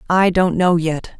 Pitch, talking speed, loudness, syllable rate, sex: 175 Hz, 200 wpm, -16 LUFS, 4.2 syllables/s, female